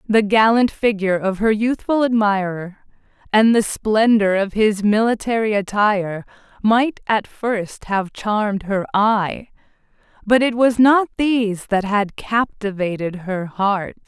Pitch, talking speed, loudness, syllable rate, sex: 210 Hz, 130 wpm, -18 LUFS, 4.0 syllables/s, female